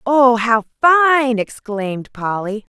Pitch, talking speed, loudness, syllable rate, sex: 240 Hz, 105 wpm, -16 LUFS, 4.0 syllables/s, female